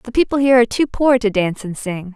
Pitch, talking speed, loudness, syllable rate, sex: 230 Hz, 280 wpm, -17 LUFS, 6.6 syllables/s, female